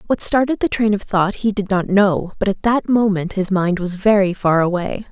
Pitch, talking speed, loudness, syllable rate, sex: 200 Hz, 235 wpm, -17 LUFS, 5.0 syllables/s, female